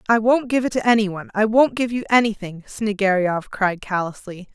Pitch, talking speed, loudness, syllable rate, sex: 210 Hz, 200 wpm, -20 LUFS, 5.5 syllables/s, female